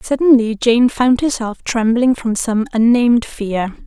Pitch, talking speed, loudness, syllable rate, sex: 235 Hz, 140 wpm, -15 LUFS, 4.1 syllables/s, female